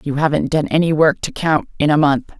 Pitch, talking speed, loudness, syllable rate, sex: 150 Hz, 250 wpm, -16 LUFS, 5.6 syllables/s, female